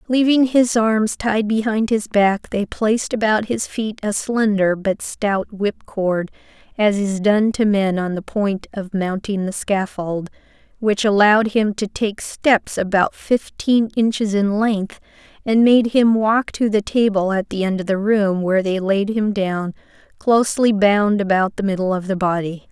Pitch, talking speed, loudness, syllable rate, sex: 205 Hz, 175 wpm, -18 LUFS, 4.2 syllables/s, female